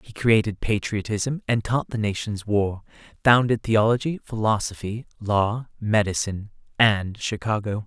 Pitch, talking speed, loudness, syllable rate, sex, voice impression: 110 Hz, 105 wpm, -23 LUFS, 4.4 syllables/s, male, masculine, adult-like, slightly refreshing, slightly calm, kind